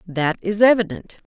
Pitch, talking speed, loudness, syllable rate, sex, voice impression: 195 Hz, 140 wpm, -18 LUFS, 4.9 syllables/s, female, feminine, middle-aged, tensed, powerful, bright, clear, slightly fluent, intellectual, slightly calm, friendly, reassuring, elegant, lively, slightly kind